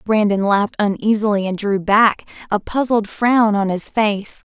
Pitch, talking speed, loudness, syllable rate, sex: 210 Hz, 160 wpm, -17 LUFS, 4.4 syllables/s, female